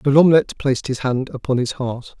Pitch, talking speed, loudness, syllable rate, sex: 135 Hz, 220 wpm, -19 LUFS, 6.1 syllables/s, male